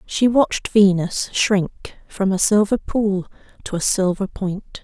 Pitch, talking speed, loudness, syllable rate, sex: 200 Hz, 150 wpm, -19 LUFS, 3.8 syllables/s, female